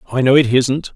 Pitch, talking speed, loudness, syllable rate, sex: 130 Hz, 250 wpm, -14 LUFS, 5.8 syllables/s, male